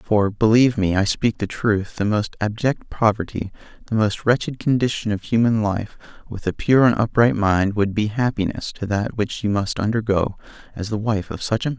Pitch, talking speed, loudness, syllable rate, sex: 110 Hz, 215 wpm, -20 LUFS, 5.2 syllables/s, male